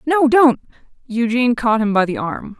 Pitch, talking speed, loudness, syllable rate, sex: 240 Hz, 185 wpm, -16 LUFS, 5.0 syllables/s, female